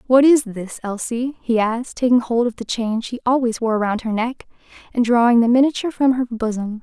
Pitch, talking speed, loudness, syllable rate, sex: 240 Hz, 210 wpm, -19 LUFS, 5.6 syllables/s, female